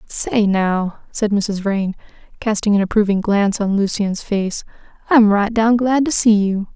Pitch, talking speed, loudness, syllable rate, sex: 210 Hz, 170 wpm, -17 LUFS, 4.2 syllables/s, female